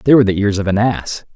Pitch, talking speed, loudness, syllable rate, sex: 105 Hz, 310 wpm, -15 LUFS, 6.4 syllables/s, male